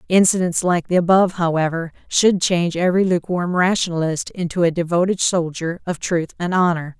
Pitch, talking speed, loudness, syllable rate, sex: 175 Hz, 155 wpm, -19 LUFS, 5.6 syllables/s, female